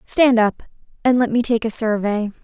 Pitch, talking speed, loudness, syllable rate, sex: 230 Hz, 195 wpm, -18 LUFS, 4.8 syllables/s, female